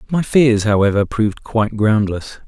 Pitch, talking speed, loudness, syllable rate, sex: 110 Hz, 145 wpm, -16 LUFS, 4.9 syllables/s, male